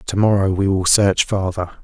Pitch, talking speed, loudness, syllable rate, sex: 95 Hz, 195 wpm, -17 LUFS, 4.7 syllables/s, male